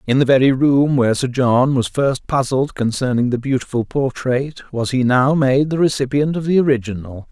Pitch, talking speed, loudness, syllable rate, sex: 130 Hz, 190 wpm, -17 LUFS, 5.1 syllables/s, male